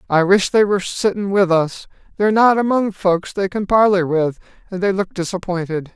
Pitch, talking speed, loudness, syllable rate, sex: 190 Hz, 190 wpm, -17 LUFS, 5.2 syllables/s, male